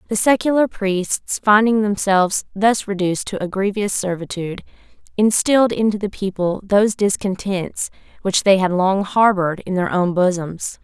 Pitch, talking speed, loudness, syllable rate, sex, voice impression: 195 Hz, 145 wpm, -18 LUFS, 4.9 syllables/s, female, very feminine, young, thin, slightly tensed, powerful, bright, slightly hard, clear, fluent, very cute, intellectual, refreshing, very sincere, calm, very friendly, reassuring, very unique, slightly elegant, wild, sweet, lively, kind, slightly intense, slightly sharp, light